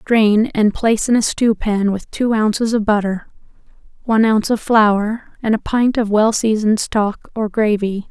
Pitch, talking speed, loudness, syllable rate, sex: 215 Hz, 185 wpm, -16 LUFS, 4.6 syllables/s, female